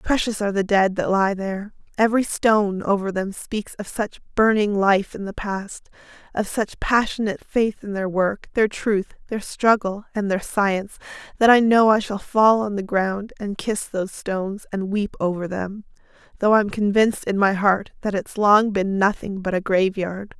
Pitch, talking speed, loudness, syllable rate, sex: 205 Hz, 190 wpm, -21 LUFS, 4.7 syllables/s, female